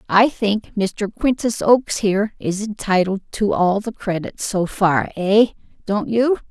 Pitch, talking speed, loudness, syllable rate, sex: 205 Hz, 140 wpm, -19 LUFS, 4.0 syllables/s, female